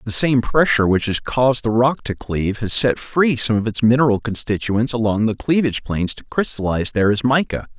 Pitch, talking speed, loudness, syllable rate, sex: 115 Hz, 210 wpm, -18 LUFS, 5.8 syllables/s, male